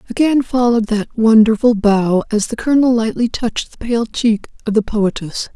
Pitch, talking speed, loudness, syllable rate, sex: 225 Hz, 175 wpm, -15 LUFS, 5.2 syllables/s, female